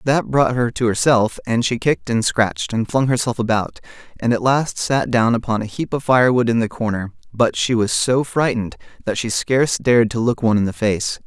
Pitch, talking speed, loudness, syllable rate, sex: 115 Hz, 225 wpm, -18 LUFS, 5.5 syllables/s, male